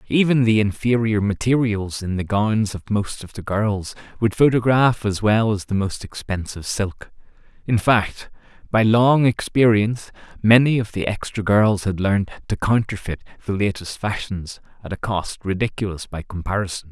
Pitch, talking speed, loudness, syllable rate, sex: 105 Hz, 155 wpm, -20 LUFS, 4.8 syllables/s, male